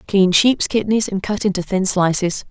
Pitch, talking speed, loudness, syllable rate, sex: 195 Hz, 190 wpm, -17 LUFS, 4.7 syllables/s, female